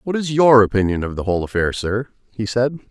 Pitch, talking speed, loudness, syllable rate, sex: 115 Hz, 225 wpm, -18 LUFS, 6.0 syllables/s, male